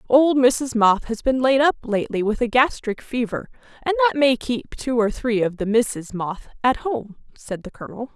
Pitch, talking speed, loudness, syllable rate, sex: 240 Hz, 205 wpm, -21 LUFS, 4.9 syllables/s, female